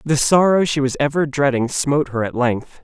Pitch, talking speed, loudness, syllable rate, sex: 140 Hz, 210 wpm, -18 LUFS, 5.1 syllables/s, male